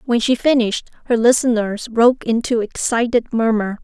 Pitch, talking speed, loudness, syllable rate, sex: 230 Hz, 140 wpm, -17 LUFS, 5.2 syllables/s, female